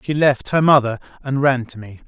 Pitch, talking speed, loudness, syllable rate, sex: 130 Hz, 230 wpm, -17 LUFS, 5.2 syllables/s, male